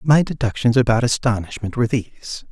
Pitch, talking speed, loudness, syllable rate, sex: 120 Hz, 145 wpm, -19 LUFS, 5.9 syllables/s, male